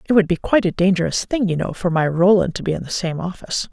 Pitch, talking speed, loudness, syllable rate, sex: 180 Hz, 290 wpm, -19 LUFS, 6.7 syllables/s, female